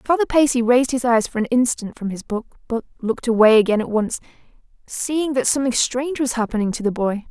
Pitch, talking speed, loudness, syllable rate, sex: 240 Hz, 215 wpm, -19 LUFS, 6.2 syllables/s, female